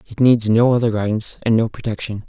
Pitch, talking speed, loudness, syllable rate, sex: 110 Hz, 210 wpm, -18 LUFS, 6.3 syllables/s, male